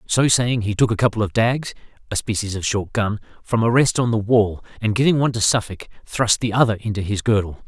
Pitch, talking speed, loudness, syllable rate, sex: 110 Hz, 220 wpm, -20 LUFS, 5.7 syllables/s, male